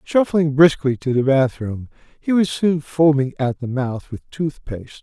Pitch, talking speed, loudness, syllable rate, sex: 140 Hz, 180 wpm, -19 LUFS, 4.4 syllables/s, male